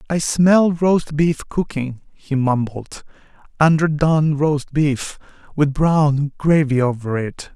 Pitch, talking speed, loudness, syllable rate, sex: 150 Hz, 105 wpm, -18 LUFS, 3.5 syllables/s, male